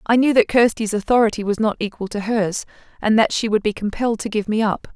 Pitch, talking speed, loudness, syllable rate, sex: 215 Hz, 240 wpm, -19 LUFS, 6.1 syllables/s, female